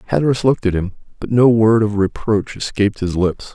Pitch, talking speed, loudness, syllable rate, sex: 105 Hz, 205 wpm, -17 LUFS, 5.9 syllables/s, male